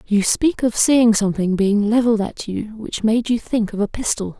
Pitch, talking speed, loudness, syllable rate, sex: 220 Hz, 220 wpm, -18 LUFS, 5.0 syllables/s, female